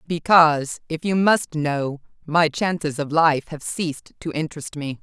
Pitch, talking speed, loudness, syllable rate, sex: 155 Hz, 155 wpm, -21 LUFS, 4.5 syllables/s, female